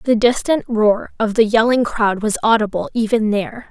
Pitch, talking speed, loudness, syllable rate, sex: 220 Hz, 180 wpm, -17 LUFS, 4.8 syllables/s, female